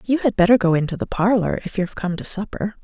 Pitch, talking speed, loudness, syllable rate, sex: 200 Hz, 255 wpm, -20 LUFS, 6.3 syllables/s, female